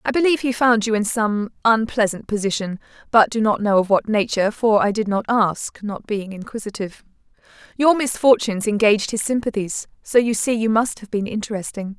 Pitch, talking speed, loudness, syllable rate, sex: 215 Hz, 185 wpm, -20 LUFS, 5.6 syllables/s, female